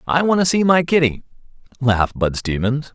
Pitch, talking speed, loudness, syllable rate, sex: 140 Hz, 185 wpm, -18 LUFS, 5.4 syllables/s, male